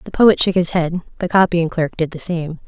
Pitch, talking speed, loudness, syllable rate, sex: 170 Hz, 245 wpm, -17 LUFS, 5.2 syllables/s, female